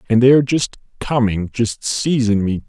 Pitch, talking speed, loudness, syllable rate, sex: 115 Hz, 180 wpm, -17 LUFS, 5.0 syllables/s, male